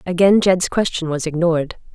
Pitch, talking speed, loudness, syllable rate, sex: 170 Hz, 155 wpm, -17 LUFS, 5.3 syllables/s, female